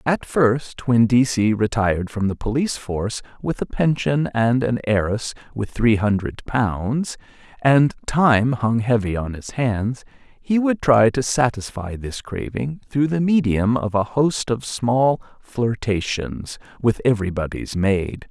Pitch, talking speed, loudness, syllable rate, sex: 120 Hz, 150 wpm, -20 LUFS, 4.0 syllables/s, male